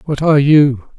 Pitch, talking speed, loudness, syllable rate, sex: 150 Hz, 185 wpm, -12 LUFS, 5.0 syllables/s, male